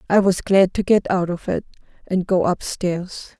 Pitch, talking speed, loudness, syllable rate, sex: 185 Hz, 195 wpm, -20 LUFS, 4.6 syllables/s, female